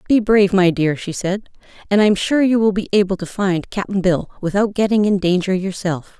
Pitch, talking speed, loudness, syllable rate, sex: 195 Hz, 225 wpm, -17 LUFS, 5.3 syllables/s, female